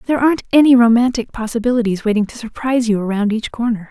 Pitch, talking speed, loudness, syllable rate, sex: 230 Hz, 185 wpm, -16 LUFS, 7.1 syllables/s, female